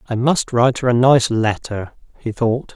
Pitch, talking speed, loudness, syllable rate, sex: 120 Hz, 195 wpm, -17 LUFS, 4.6 syllables/s, male